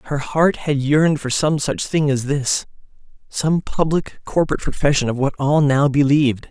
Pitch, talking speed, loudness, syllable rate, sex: 145 Hz, 165 wpm, -18 LUFS, 4.9 syllables/s, male